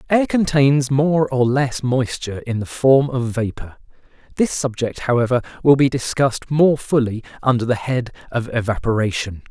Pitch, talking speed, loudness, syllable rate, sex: 125 Hz, 150 wpm, -19 LUFS, 4.9 syllables/s, male